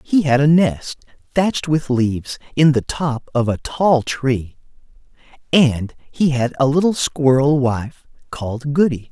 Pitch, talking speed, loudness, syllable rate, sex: 140 Hz, 150 wpm, -18 LUFS, 4.1 syllables/s, male